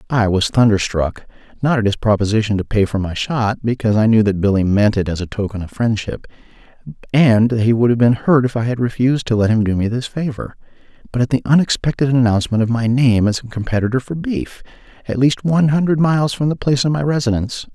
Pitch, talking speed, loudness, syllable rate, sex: 120 Hz, 225 wpm, -17 LUFS, 6.2 syllables/s, male